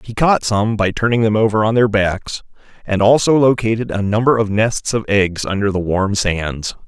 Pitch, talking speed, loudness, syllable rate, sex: 105 Hz, 200 wpm, -16 LUFS, 4.8 syllables/s, male